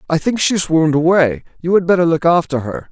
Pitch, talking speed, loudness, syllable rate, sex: 165 Hz, 225 wpm, -15 LUFS, 6.0 syllables/s, male